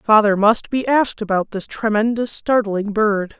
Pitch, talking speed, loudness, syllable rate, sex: 215 Hz, 160 wpm, -18 LUFS, 4.5 syllables/s, female